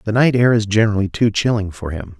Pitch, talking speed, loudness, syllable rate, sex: 105 Hz, 245 wpm, -17 LUFS, 6.3 syllables/s, male